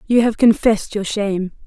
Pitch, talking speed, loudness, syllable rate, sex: 210 Hz, 180 wpm, -17 LUFS, 5.6 syllables/s, female